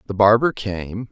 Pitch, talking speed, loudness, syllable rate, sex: 105 Hz, 160 wpm, -19 LUFS, 4.3 syllables/s, male